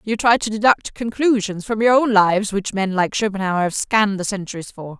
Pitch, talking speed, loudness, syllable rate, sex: 205 Hz, 215 wpm, -18 LUFS, 5.5 syllables/s, female